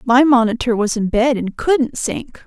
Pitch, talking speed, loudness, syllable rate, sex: 245 Hz, 195 wpm, -16 LUFS, 4.2 syllables/s, female